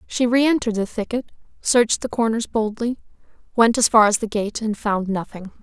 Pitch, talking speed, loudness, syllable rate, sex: 225 Hz, 180 wpm, -20 LUFS, 5.5 syllables/s, female